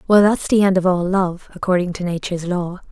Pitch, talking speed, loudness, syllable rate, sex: 180 Hz, 205 wpm, -18 LUFS, 5.7 syllables/s, female